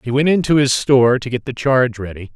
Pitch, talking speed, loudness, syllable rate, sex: 125 Hz, 255 wpm, -16 LUFS, 6.2 syllables/s, male